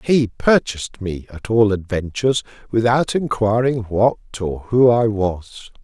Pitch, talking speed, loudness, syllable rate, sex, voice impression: 110 Hz, 135 wpm, -18 LUFS, 3.9 syllables/s, male, masculine, old, relaxed, powerful, hard, muffled, raspy, calm, mature, wild, lively, strict, slightly intense, sharp